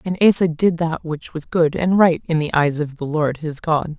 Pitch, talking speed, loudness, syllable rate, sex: 160 Hz, 255 wpm, -19 LUFS, 4.8 syllables/s, female